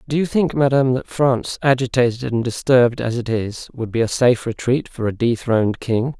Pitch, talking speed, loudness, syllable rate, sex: 125 Hz, 205 wpm, -19 LUFS, 5.6 syllables/s, male